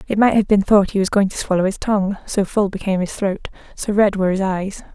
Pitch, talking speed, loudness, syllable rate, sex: 195 Hz, 265 wpm, -18 LUFS, 6.1 syllables/s, female